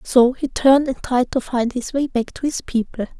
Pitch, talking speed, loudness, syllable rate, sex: 255 Hz, 245 wpm, -19 LUFS, 5.0 syllables/s, female